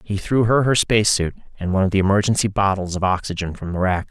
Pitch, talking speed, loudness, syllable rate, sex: 100 Hz, 235 wpm, -19 LUFS, 6.6 syllables/s, male